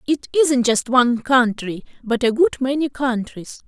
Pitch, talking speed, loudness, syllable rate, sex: 255 Hz, 165 wpm, -18 LUFS, 4.5 syllables/s, female